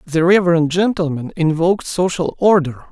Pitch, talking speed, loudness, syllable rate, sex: 170 Hz, 125 wpm, -16 LUFS, 5.1 syllables/s, male